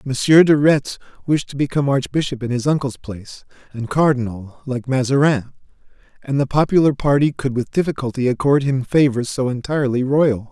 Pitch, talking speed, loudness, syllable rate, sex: 135 Hz, 160 wpm, -18 LUFS, 5.5 syllables/s, male